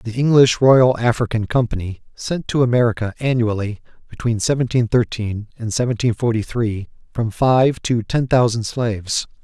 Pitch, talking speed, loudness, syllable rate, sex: 115 Hz, 140 wpm, -18 LUFS, 4.9 syllables/s, male